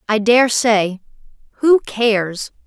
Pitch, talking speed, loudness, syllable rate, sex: 225 Hz, 115 wpm, -16 LUFS, 3.4 syllables/s, female